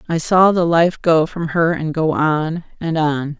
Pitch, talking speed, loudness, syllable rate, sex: 160 Hz, 210 wpm, -17 LUFS, 3.9 syllables/s, female